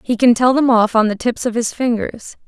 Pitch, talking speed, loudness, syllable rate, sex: 235 Hz, 265 wpm, -15 LUFS, 5.2 syllables/s, female